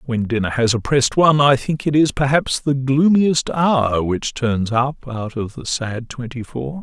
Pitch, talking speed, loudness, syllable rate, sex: 130 Hz, 195 wpm, -18 LUFS, 4.2 syllables/s, male